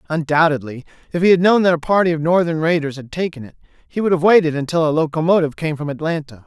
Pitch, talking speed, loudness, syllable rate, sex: 160 Hz, 225 wpm, -17 LUFS, 6.8 syllables/s, male